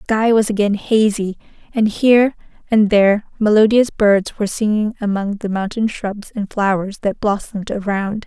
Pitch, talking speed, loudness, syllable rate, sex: 210 Hz, 160 wpm, -17 LUFS, 5.0 syllables/s, female